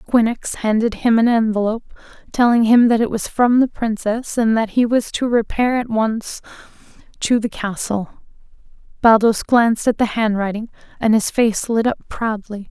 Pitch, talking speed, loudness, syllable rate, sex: 225 Hz, 165 wpm, -17 LUFS, 4.8 syllables/s, female